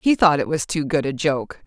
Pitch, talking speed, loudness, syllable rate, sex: 150 Hz, 290 wpm, -20 LUFS, 4.9 syllables/s, female